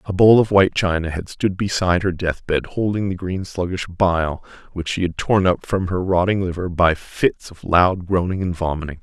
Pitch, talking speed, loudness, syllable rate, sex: 90 Hz, 200 wpm, -19 LUFS, 4.9 syllables/s, male